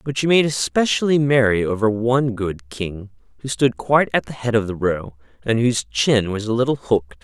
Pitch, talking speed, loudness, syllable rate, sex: 115 Hz, 205 wpm, -19 LUFS, 5.2 syllables/s, male